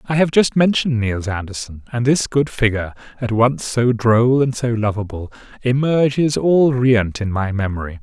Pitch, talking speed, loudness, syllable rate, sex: 120 Hz, 170 wpm, -18 LUFS, 4.9 syllables/s, male